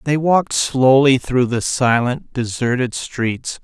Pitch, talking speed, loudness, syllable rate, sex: 130 Hz, 130 wpm, -17 LUFS, 3.7 syllables/s, male